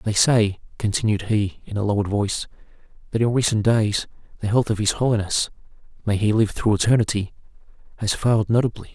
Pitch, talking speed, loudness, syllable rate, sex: 110 Hz, 155 wpm, -21 LUFS, 6.0 syllables/s, male